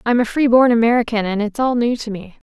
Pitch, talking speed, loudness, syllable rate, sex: 230 Hz, 260 wpm, -16 LUFS, 6.1 syllables/s, female